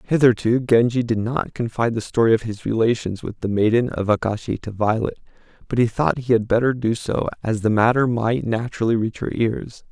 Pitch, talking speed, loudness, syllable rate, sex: 115 Hz, 200 wpm, -20 LUFS, 5.5 syllables/s, male